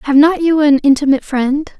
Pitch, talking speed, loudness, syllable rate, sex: 290 Hz, 200 wpm, -13 LUFS, 5.8 syllables/s, female